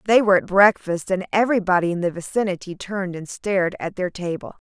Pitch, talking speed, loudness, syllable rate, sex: 185 Hz, 195 wpm, -21 LUFS, 6.2 syllables/s, female